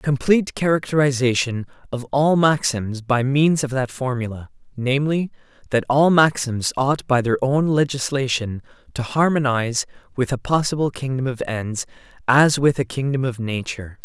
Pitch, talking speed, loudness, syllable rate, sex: 130 Hz, 145 wpm, -20 LUFS, 4.9 syllables/s, male